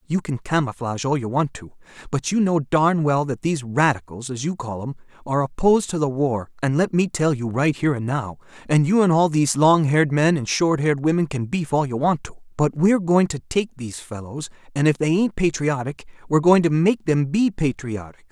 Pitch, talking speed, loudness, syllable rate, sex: 145 Hz, 230 wpm, -21 LUFS, 5.7 syllables/s, male